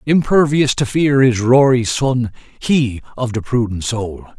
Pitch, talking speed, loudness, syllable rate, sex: 125 Hz, 150 wpm, -16 LUFS, 3.9 syllables/s, male